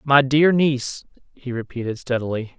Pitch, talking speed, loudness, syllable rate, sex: 130 Hz, 140 wpm, -21 LUFS, 5.0 syllables/s, male